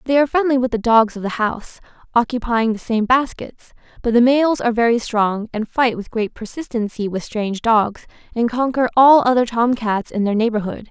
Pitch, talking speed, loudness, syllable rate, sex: 230 Hz, 200 wpm, -18 LUFS, 5.4 syllables/s, female